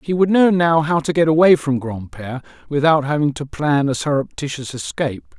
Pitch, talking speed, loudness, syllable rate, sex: 145 Hz, 190 wpm, -17 LUFS, 5.4 syllables/s, male